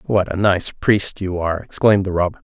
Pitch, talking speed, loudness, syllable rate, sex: 95 Hz, 215 wpm, -18 LUFS, 5.4 syllables/s, male